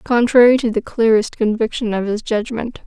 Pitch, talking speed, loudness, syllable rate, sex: 225 Hz, 170 wpm, -16 LUFS, 5.1 syllables/s, female